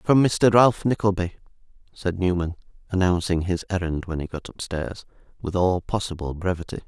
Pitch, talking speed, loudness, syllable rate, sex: 90 Hz, 150 wpm, -24 LUFS, 5.1 syllables/s, male